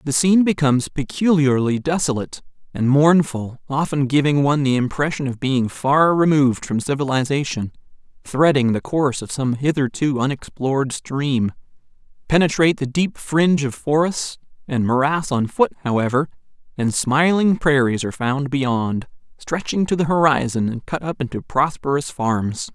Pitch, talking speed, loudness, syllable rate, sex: 140 Hz, 140 wpm, -19 LUFS, 5.0 syllables/s, male